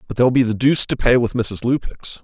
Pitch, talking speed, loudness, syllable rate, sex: 120 Hz, 270 wpm, -18 LUFS, 6.8 syllables/s, male